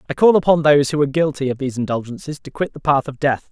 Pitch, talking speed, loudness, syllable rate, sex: 145 Hz, 275 wpm, -18 LUFS, 7.2 syllables/s, male